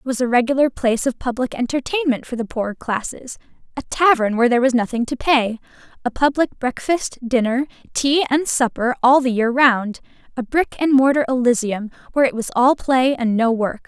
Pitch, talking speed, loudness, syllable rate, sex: 250 Hz, 190 wpm, -18 LUFS, 5.4 syllables/s, female